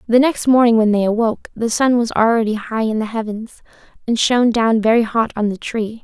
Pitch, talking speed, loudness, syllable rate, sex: 225 Hz, 220 wpm, -16 LUFS, 5.6 syllables/s, female